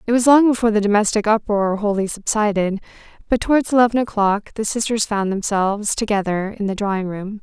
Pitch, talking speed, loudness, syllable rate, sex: 210 Hz, 180 wpm, -18 LUFS, 5.9 syllables/s, female